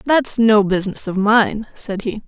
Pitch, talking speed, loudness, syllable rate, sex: 215 Hz, 185 wpm, -17 LUFS, 4.4 syllables/s, female